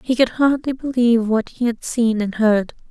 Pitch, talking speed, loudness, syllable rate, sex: 235 Hz, 205 wpm, -18 LUFS, 4.9 syllables/s, female